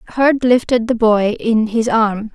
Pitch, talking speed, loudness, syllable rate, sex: 225 Hz, 180 wpm, -15 LUFS, 4.1 syllables/s, female